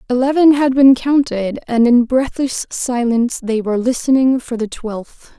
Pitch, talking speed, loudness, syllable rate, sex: 250 Hz, 155 wpm, -15 LUFS, 4.5 syllables/s, female